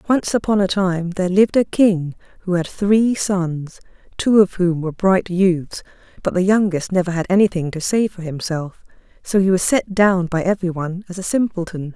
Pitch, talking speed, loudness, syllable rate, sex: 185 Hz, 190 wpm, -18 LUFS, 5.1 syllables/s, female